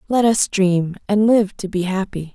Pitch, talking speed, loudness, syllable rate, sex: 200 Hz, 205 wpm, -18 LUFS, 4.4 syllables/s, female